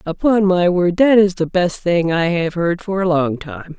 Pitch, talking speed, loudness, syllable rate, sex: 175 Hz, 240 wpm, -16 LUFS, 4.4 syllables/s, female